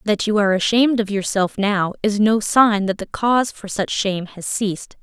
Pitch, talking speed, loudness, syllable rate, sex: 205 Hz, 215 wpm, -19 LUFS, 5.2 syllables/s, female